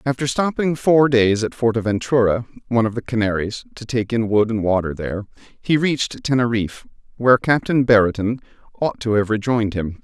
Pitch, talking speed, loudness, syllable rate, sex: 115 Hz, 165 wpm, -19 LUFS, 5.6 syllables/s, male